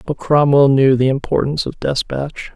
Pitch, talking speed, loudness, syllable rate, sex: 140 Hz, 165 wpm, -15 LUFS, 4.9 syllables/s, male